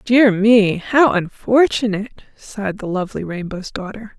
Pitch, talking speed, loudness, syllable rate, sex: 210 Hz, 130 wpm, -17 LUFS, 4.7 syllables/s, female